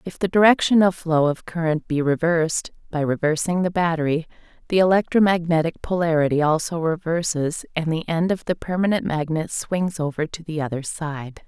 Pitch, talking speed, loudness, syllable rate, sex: 165 Hz, 160 wpm, -21 LUFS, 5.3 syllables/s, female